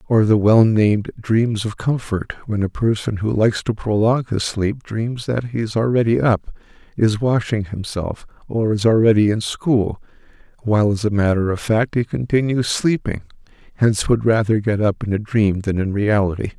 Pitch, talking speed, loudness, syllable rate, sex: 110 Hz, 180 wpm, -19 LUFS, 4.9 syllables/s, male